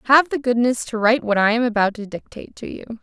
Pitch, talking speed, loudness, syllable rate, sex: 235 Hz, 260 wpm, -18 LUFS, 6.3 syllables/s, female